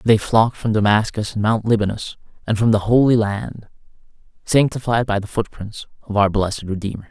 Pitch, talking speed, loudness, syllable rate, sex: 110 Hz, 170 wpm, -19 LUFS, 5.6 syllables/s, male